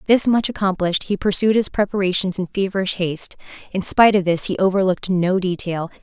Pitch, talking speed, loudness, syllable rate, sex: 190 Hz, 180 wpm, -19 LUFS, 6.1 syllables/s, female